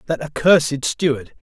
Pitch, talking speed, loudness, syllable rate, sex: 145 Hz, 120 wpm, -18 LUFS, 5.1 syllables/s, male